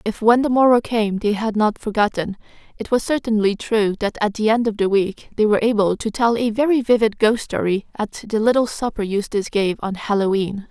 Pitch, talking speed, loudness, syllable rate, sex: 215 Hz, 220 wpm, -19 LUFS, 5.5 syllables/s, female